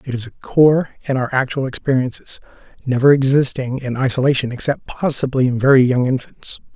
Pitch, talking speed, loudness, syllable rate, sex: 130 Hz, 160 wpm, -17 LUFS, 5.6 syllables/s, male